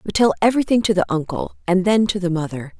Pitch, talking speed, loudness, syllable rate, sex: 190 Hz, 235 wpm, -19 LUFS, 6.5 syllables/s, female